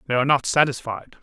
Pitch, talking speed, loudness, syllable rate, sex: 130 Hz, 195 wpm, -20 LUFS, 7.0 syllables/s, male